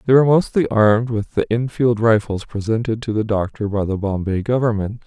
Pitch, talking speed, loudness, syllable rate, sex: 110 Hz, 190 wpm, -19 LUFS, 5.6 syllables/s, male